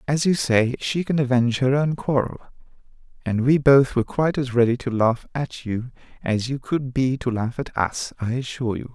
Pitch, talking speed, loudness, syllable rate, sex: 130 Hz, 210 wpm, -22 LUFS, 5.3 syllables/s, male